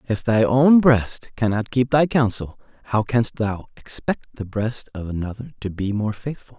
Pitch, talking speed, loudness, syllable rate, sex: 115 Hz, 180 wpm, -21 LUFS, 4.7 syllables/s, male